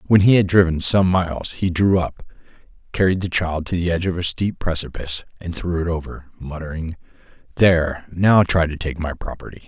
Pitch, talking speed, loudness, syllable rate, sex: 85 Hz, 190 wpm, -19 LUFS, 5.6 syllables/s, male